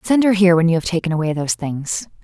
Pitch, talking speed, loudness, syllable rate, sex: 175 Hz, 270 wpm, -17 LUFS, 6.9 syllables/s, female